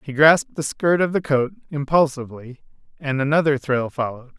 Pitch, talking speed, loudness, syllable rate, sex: 140 Hz, 165 wpm, -20 LUFS, 5.7 syllables/s, male